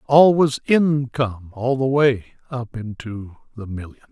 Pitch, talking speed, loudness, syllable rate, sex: 125 Hz, 145 wpm, -20 LUFS, 4.2 syllables/s, male